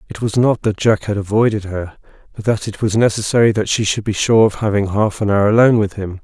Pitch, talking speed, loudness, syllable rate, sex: 105 Hz, 250 wpm, -16 LUFS, 6.0 syllables/s, male